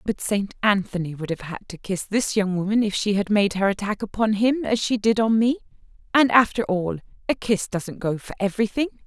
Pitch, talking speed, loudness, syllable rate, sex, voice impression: 210 Hz, 210 wpm, -22 LUFS, 5.5 syllables/s, female, feminine, middle-aged, tensed, powerful, clear, fluent, calm, friendly, reassuring, elegant, lively, slightly strict, slightly intense